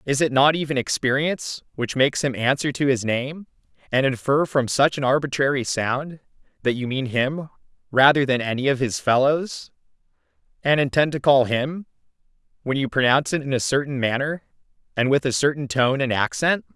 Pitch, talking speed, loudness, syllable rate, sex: 135 Hz, 175 wpm, -21 LUFS, 5.3 syllables/s, male